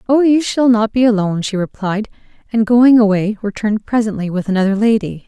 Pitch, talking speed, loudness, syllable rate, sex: 215 Hz, 180 wpm, -15 LUFS, 5.8 syllables/s, female